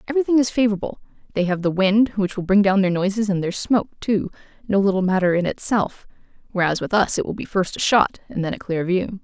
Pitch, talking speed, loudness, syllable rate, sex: 200 Hz, 235 wpm, -20 LUFS, 6.2 syllables/s, female